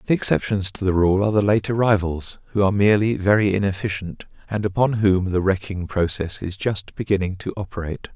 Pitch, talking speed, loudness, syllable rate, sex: 100 Hz, 185 wpm, -21 LUFS, 6.0 syllables/s, male